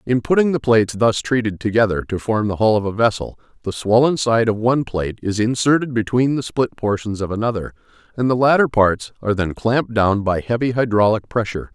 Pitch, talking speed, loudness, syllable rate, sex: 115 Hz, 205 wpm, -18 LUFS, 5.8 syllables/s, male